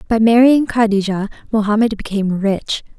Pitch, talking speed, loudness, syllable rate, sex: 215 Hz, 120 wpm, -16 LUFS, 5.3 syllables/s, female